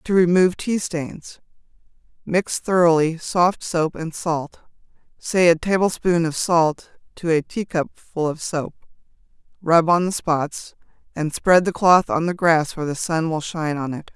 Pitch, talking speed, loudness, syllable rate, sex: 165 Hz, 155 wpm, -20 LUFS, 4.4 syllables/s, female